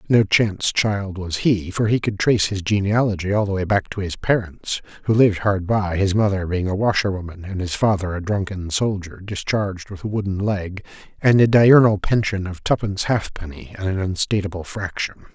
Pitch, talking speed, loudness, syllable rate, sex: 100 Hz, 190 wpm, -20 LUFS, 5.3 syllables/s, male